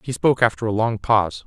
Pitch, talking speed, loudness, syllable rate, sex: 110 Hz, 245 wpm, -20 LUFS, 6.6 syllables/s, male